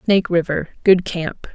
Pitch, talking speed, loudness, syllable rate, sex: 175 Hz, 115 wpm, -18 LUFS, 4.8 syllables/s, female